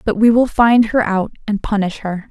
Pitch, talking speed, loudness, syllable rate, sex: 215 Hz, 235 wpm, -15 LUFS, 4.9 syllables/s, female